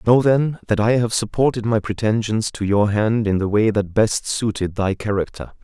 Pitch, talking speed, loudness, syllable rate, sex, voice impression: 110 Hz, 200 wpm, -19 LUFS, 4.9 syllables/s, male, masculine, adult-like, tensed, slightly bright, clear, fluent, cool, intellectual, slightly refreshing, calm, friendly, lively, kind